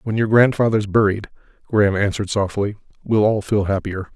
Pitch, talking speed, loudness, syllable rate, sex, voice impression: 105 Hz, 160 wpm, -19 LUFS, 5.6 syllables/s, male, masculine, adult-like, thick, tensed, powerful, slightly hard, slightly muffled, cool, intellectual, calm, slightly mature, wild, lively, slightly kind, slightly modest